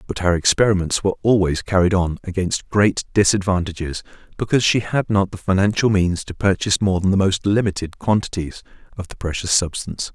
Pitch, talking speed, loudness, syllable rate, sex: 95 Hz, 170 wpm, -19 LUFS, 5.8 syllables/s, male